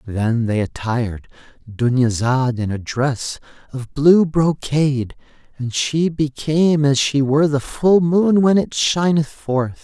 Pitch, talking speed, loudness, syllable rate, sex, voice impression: 140 Hz, 140 wpm, -18 LUFS, 3.9 syllables/s, male, masculine, adult-like, slightly soft, slightly sincere, slightly unique